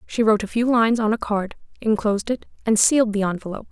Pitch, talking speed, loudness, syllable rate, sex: 215 Hz, 225 wpm, -21 LUFS, 7.0 syllables/s, female